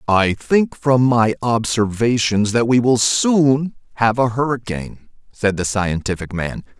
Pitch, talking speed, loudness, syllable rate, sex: 115 Hz, 140 wpm, -17 LUFS, 4.0 syllables/s, male